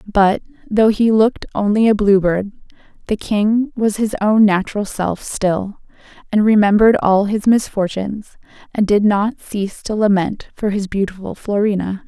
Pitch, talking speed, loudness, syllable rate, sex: 205 Hz, 155 wpm, -16 LUFS, 4.7 syllables/s, female